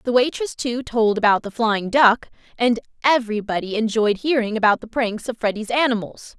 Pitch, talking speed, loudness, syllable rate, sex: 230 Hz, 170 wpm, -20 LUFS, 5.3 syllables/s, female